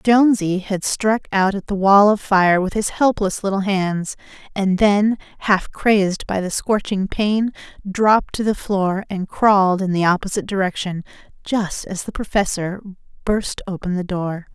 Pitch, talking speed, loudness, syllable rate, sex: 195 Hz, 165 wpm, -19 LUFS, 4.5 syllables/s, female